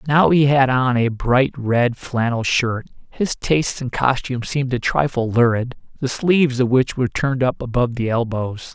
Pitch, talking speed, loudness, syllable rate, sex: 125 Hz, 170 wpm, -19 LUFS, 4.9 syllables/s, male